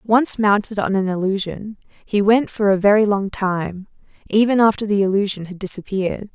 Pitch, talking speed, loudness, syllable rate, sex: 200 Hz, 170 wpm, -18 LUFS, 5.1 syllables/s, female